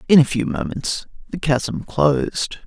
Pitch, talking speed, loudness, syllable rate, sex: 150 Hz, 160 wpm, -20 LUFS, 4.0 syllables/s, male